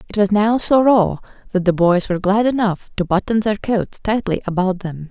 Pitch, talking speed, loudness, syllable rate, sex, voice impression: 200 Hz, 210 wpm, -17 LUFS, 5.1 syllables/s, female, very feminine, adult-like, slightly fluent, slightly cute, slightly friendly, elegant